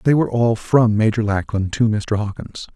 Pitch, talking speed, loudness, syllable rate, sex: 110 Hz, 195 wpm, -18 LUFS, 5.1 syllables/s, male